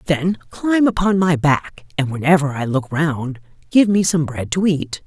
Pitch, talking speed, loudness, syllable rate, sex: 160 Hz, 190 wpm, -18 LUFS, 4.4 syllables/s, female